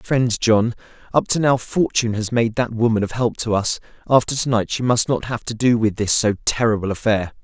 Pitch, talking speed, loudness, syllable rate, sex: 115 Hz, 225 wpm, -19 LUFS, 5.3 syllables/s, male